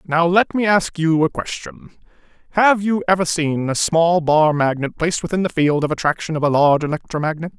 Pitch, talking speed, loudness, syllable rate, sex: 165 Hz, 200 wpm, -18 LUFS, 5.7 syllables/s, male